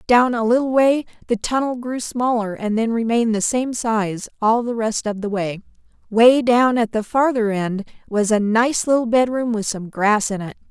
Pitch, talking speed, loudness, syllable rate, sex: 230 Hz, 200 wpm, -19 LUFS, 4.7 syllables/s, female